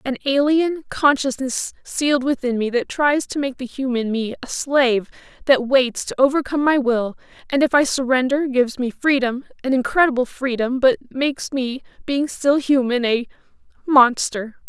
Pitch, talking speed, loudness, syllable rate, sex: 260 Hz, 145 wpm, -19 LUFS, 5.0 syllables/s, female